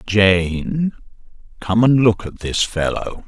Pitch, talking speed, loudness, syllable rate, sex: 105 Hz, 130 wpm, -18 LUFS, 3.3 syllables/s, male